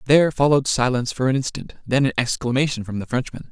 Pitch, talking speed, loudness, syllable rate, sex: 130 Hz, 205 wpm, -21 LUFS, 6.9 syllables/s, male